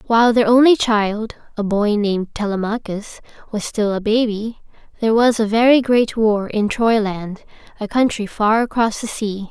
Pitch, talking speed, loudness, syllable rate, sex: 220 Hz, 165 wpm, -17 LUFS, 4.7 syllables/s, female